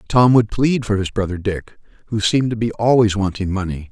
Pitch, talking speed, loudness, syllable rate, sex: 105 Hz, 215 wpm, -18 LUFS, 5.6 syllables/s, male